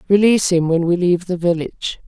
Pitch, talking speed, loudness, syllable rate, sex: 180 Hz, 200 wpm, -17 LUFS, 6.6 syllables/s, female